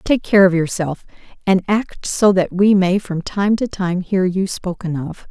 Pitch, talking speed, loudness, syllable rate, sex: 190 Hz, 205 wpm, -17 LUFS, 4.2 syllables/s, female